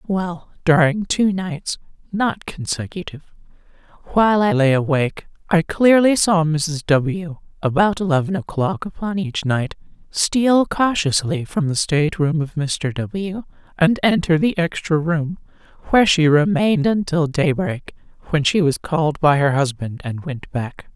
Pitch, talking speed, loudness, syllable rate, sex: 170 Hz, 145 wpm, -19 LUFS, 4.2 syllables/s, female